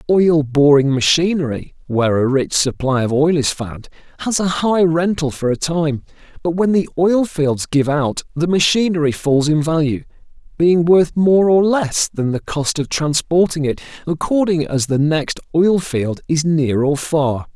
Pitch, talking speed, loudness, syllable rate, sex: 155 Hz, 175 wpm, -16 LUFS, 4.3 syllables/s, male